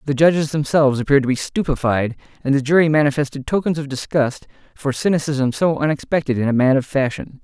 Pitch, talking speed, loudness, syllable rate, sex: 140 Hz, 185 wpm, -18 LUFS, 6.2 syllables/s, male